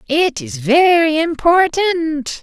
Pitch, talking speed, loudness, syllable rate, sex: 305 Hz, 100 wpm, -14 LUFS, 3.1 syllables/s, male